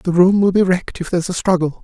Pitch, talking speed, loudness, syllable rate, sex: 180 Hz, 295 wpm, -16 LUFS, 6.7 syllables/s, male